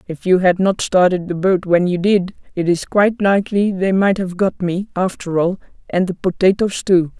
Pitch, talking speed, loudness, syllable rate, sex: 185 Hz, 210 wpm, -17 LUFS, 5.0 syllables/s, female